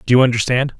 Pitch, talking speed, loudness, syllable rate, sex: 125 Hz, 225 wpm, -15 LUFS, 7.4 syllables/s, male